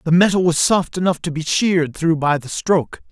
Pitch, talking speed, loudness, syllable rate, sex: 165 Hz, 230 wpm, -18 LUFS, 5.5 syllables/s, male